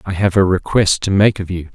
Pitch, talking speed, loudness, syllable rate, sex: 95 Hz, 275 wpm, -15 LUFS, 5.7 syllables/s, male